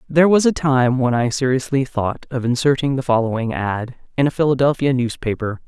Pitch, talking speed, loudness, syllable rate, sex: 130 Hz, 180 wpm, -18 LUFS, 5.6 syllables/s, female